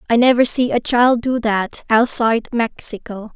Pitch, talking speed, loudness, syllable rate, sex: 235 Hz, 160 wpm, -17 LUFS, 4.6 syllables/s, female